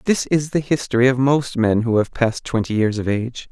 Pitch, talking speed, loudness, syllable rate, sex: 125 Hz, 240 wpm, -19 LUFS, 5.6 syllables/s, male